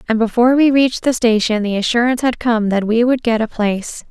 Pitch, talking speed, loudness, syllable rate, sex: 230 Hz, 235 wpm, -15 LUFS, 6.2 syllables/s, female